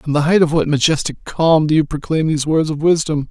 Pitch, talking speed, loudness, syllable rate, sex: 155 Hz, 255 wpm, -16 LUFS, 5.8 syllables/s, male